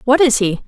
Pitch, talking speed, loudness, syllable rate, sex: 245 Hz, 265 wpm, -14 LUFS, 5.8 syllables/s, female